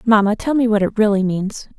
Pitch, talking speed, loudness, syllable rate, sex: 215 Hz, 235 wpm, -17 LUFS, 5.6 syllables/s, female